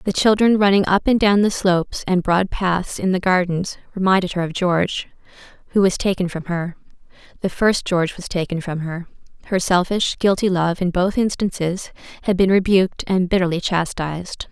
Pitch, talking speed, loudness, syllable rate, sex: 185 Hz, 180 wpm, -19 LUFS, 5.2 syllables/s, female